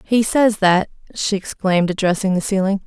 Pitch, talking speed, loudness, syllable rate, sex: 195 Hz, 165 wpm, -18 LUFS, 5.2 syllables/s, female